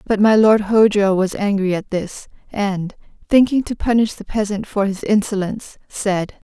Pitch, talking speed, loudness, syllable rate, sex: 205 Hz, 165 wpm, -18 LUFS, 4.6 syllables/s, female